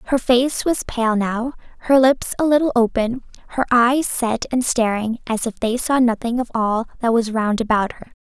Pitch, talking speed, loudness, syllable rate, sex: 240 Hz, 195 wpm, -19 LUFS, 4.5 syllables/s, female